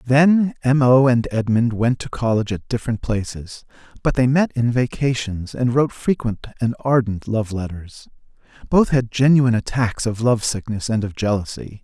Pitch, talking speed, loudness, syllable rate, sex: 120 Hz, 165 wpm, -19 LUFS, 4.9 syllables/s, male